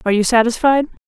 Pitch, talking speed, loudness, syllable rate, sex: 240 Hz, 170 wpm, -15 LUFS, 7.6 syllables/s, female